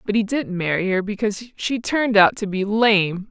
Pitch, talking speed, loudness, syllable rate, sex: 210 Hz, 220 wpm, -20 LUFS, 5.0 syllables/s, female